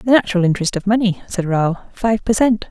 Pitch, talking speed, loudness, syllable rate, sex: 200 Hz, 200 wpm, -17 LUFS, 6.1 syllables/s, female